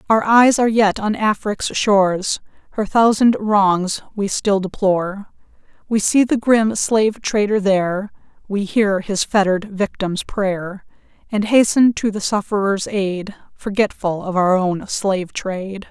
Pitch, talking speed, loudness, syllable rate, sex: 200 Hz, 145 wpm, -18 LUFS, 4.2 syllables/s, female